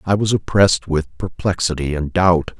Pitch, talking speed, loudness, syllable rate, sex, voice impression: 90 Hz, 160 wpm, -18 LUFS, 4.9 syllables/s, male, very masculine, very adult-like, thick, cool, sincere, slightly friendly, slightly elegant